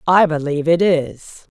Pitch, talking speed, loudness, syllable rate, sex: 160 Hz, 155 wpm, -16 LUFS, 4.6 syllables/s, female